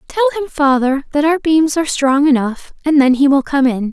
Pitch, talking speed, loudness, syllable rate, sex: 280 Hz, 230 wpm, -14 LUFS, 5.9 syllables/s, female